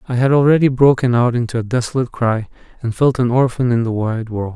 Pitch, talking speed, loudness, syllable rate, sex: 120 Hz, 225 wpm, -16 LUFS, 6.1 syllables/s, male